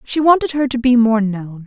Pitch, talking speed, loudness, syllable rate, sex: 245 Hz, 250 wpm, -15 LUFS, 5.1 syllables/s, female